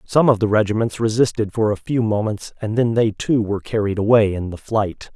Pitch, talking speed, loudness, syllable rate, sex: 110 Hz, 220 wpm, -19 LUFS, 5.4 syllables/s, male